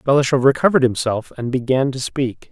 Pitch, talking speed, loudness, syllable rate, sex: 130 Hz, 165 wpm, -18 LUFS, 5.8 syllables/s, male